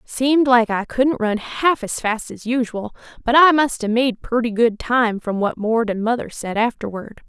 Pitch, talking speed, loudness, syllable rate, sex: 235 Hz, 205 wpm, -19 LUFS, 4.5 syllables/s, female